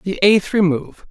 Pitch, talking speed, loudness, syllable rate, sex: 185 Hz, 165 wpm, -16 LUFS, 5.1 syllables/s, male